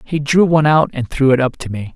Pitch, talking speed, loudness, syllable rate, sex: 140 Hz, 305 wpm, -14 LUFS, 6.0 syllables/s, male